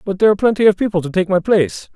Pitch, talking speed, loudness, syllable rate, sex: 185 Hz, 305 wpm, -15 LUFS, 8.2 syllables/s, male